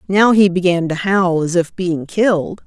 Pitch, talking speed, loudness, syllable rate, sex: 180 Hz, 200 wpm, -15 LUFS, 4.4 syllables/s, female